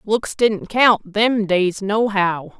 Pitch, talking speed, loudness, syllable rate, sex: 205 Hz, 140 wpm, -18 LUFS, 2.8 syllables/s, female